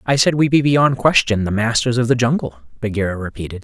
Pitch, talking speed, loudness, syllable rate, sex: 120 Hz, 215 wpm, -17 LUFS, 5.9 syllables/s, male